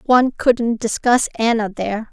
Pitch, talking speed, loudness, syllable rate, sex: 230 Hz, 140 wpm, -18 LUFS, 4.8 syllables/s, female